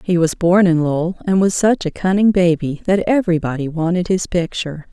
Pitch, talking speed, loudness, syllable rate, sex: 175 Hz, 195 wpm, -17 LUFS, 5.6 syllables/s, female